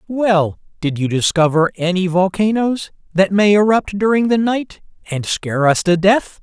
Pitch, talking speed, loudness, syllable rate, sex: 190 Hz, 160 wpm, -16 LUFS, 4.5 syllables/s, male